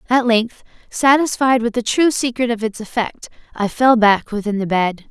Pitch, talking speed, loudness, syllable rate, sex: 230 Hz, 190 wpm, -17 LUFS, 4.8 syllables/s, female